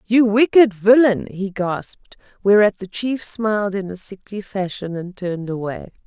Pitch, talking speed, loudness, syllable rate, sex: 200 Hz, 160 wpm, -19 LUFS, 4.5 syllables/s, female